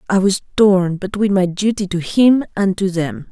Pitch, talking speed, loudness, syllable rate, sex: 195 Hz, 200 wpm, -16 LUFS, 4.6 syllables/s, female